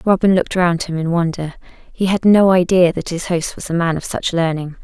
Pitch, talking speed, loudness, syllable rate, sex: 175 Hz, 235 wpm, -16 LUFS, 5.4 syllables/s, female